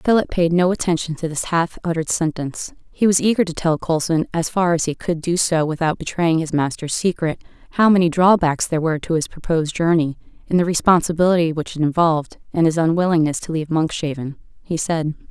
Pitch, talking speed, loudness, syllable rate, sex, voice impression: 165 Hz, 195 wpm, -19 LUFS, 6.0 syllables/s, female, feminine, adult-like, slightly middle-aged, thin, slightly tensed, slightly weak, slightly dark, slightly hard, very clear, fluent, slightly raspy, cool, very intellectual, refreshing, very sincere, calm, slightly friendly, slightly reassuring, slightly unique, elegant, slightly sweet, slightly strict, slightly sharp